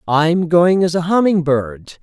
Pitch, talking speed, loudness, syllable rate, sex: 165 Hz, 210 wpm, -15 LUFS, 4.2 syllables/s, male